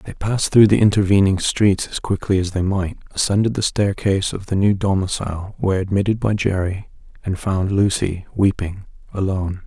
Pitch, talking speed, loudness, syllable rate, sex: 95 Hz, 170 wpm, -19 LUFS, 5.3 syllables/s, male